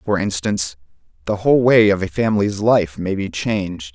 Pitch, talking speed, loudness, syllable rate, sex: 100 Hz, 185 wpm, -18 LUFS, 5.3 syllables/s, male